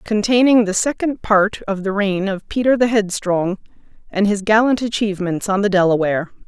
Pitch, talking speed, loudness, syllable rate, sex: 205 Hz, 165 wpm, -17 LUFS, 5.2 syllables/s, female